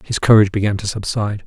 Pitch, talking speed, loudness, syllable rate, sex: 105 Hz, 205 wpm, -16 LUFS, 7.4 syllables/s, male